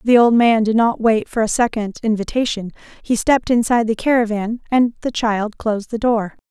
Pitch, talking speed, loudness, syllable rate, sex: 225 Hz, 195 wpm, -17 LUFS, 5.3 syllables/s, female